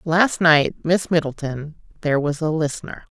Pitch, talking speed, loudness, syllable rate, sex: 160 Hz, 150 wpm, -20 LUFS, 4.9 syllables/s, female